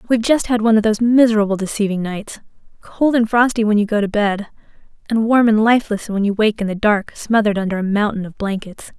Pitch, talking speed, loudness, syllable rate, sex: 215 Hz, 215 wpm, -17 LUFS, 6.3 syllables/s, female